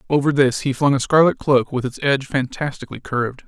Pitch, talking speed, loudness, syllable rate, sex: 135 Hz, 205 wpm, -19 LUFS, 6.2 syllables/s, male